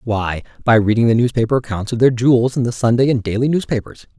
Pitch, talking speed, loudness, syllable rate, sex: 120 Hz, 215 wpm, -16 LUFS, 6.4 syllables/s, male